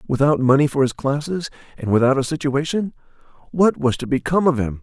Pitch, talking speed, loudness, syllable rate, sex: 140 Hz, 175 wpm, -19 LUFS, 6.0 syllables/s, male